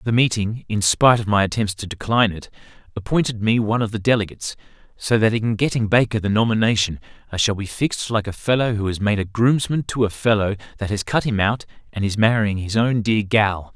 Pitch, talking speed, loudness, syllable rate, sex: 110 Hz, 220 wpm, -20 LUFS, 5.9 syllables/s, male